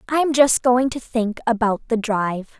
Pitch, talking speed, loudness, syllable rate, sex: 235 Hz, 185 wpm, -19 LUFS, 4.4 syllables/s, female